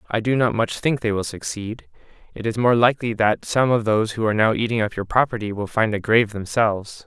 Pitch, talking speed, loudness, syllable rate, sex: 110 Hz, 240 wpm, -21 LUFS, 6.1 syllables/s, male